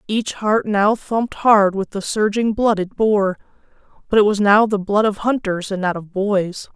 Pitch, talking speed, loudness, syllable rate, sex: 205 Hz, 205 wpm, -18 LUFS, 4.5 syllables/s, female